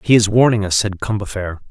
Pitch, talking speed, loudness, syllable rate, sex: 105 Hz, 210 wpm, -17 LUFS, 6.9 syllables/s, male